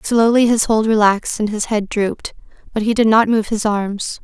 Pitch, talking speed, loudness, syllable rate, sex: 215 Hz, 210 wpm, -16 LUFS, 5.1 syllables/s, female